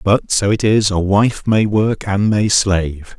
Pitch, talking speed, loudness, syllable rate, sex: 100 Hz, 205 wpm, -15 LUFS, 3.9 syllables/s, male